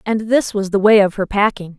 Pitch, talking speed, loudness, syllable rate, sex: 205 Hz, 270 wpm, -15 LUFS, 5.4 syllables/s, female